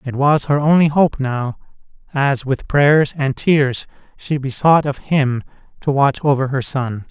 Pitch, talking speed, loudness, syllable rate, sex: 140 Hz, 170 wpm, -17 LUFS, 4.0 syllables/s, male